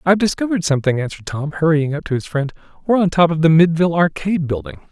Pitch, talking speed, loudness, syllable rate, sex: 160 Hz, 220 wpm, -17 LUFS, 7.7 syllables/s, male